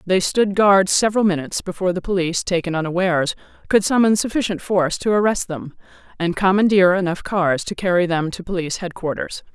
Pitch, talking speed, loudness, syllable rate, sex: 185 Hz, 170 wpm, -19 LUFS, 6.1 syllables/s, female